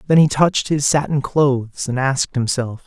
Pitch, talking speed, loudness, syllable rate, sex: 135 Hz, 190 wpm, -18 LUFS, 5.2 syllables/s, male